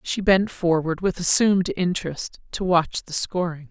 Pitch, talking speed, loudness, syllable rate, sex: 180 Hz, 160 wpm, -22 LUFS, 4.6 syllables/s, female